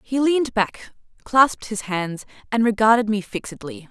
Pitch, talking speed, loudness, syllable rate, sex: 220 Hz, 155 wpm, -20 LUFS, 4.9 syllables/s, female